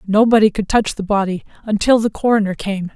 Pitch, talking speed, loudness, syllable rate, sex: 210 Hz, 185 wpm, -16 LUFS, 5.7 syllables/s, female